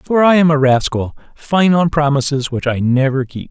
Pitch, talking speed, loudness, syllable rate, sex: 145 Hz, 205 wpm, -14 LUFS, 4.9 syllables/s, male